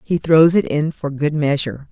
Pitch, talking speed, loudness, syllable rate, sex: 150 Hz, 220 wpm, -17 LUFS, 5.0 syllables/s, female